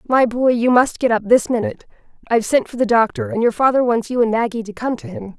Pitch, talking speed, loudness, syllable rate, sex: 235 Hz, 265 wpm, -17 LUFS, 6.2 syllables/s, female